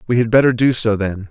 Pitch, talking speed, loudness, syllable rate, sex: 115 Hz, 275 wpm, -15 LUFS, 6.1 syllables/s, male